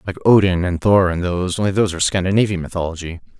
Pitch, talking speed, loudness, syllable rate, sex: 90 Hz, 195 wpm, -17 LUFS, 7.3 syllables/s, male